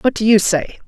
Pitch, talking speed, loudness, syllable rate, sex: 215 Hz, 275 wpm, -15 LUFS, 5.1 syllables/s, female